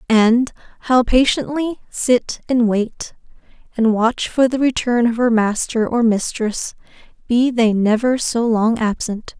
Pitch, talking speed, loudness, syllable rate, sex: 235 Hz, 140 wpm, -17 LUFS, 3.8 syllables/s, female